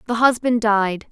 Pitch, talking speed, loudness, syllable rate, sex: 225 Hz, 160 wpm, -18 LUFS, 4.2 syllables/s, female